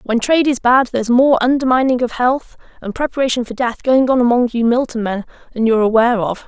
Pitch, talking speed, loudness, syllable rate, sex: 245 Hz, 215 wpm, -15 LUFS, 6.2 syllables/s, female